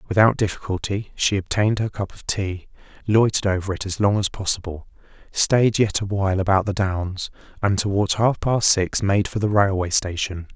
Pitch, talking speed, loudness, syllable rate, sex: 100 Hz, 175 wpm, -21 LUFS, 5.2 syllables/s, male